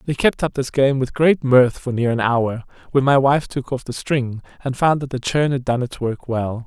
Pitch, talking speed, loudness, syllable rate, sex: 130 Hz, 260 wpm, -19 LUFS, 4.8 syllables/s, male